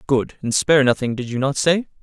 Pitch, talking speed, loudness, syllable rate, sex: 135 Hz, 235 wpm, -19 LUFS, 5.8 syllables/s, male